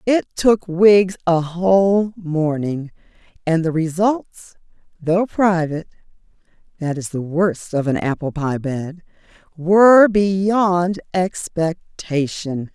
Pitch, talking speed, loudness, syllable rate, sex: 175 Hz, 110 wpm, -18 LUFS, 3.9 syllables/s, female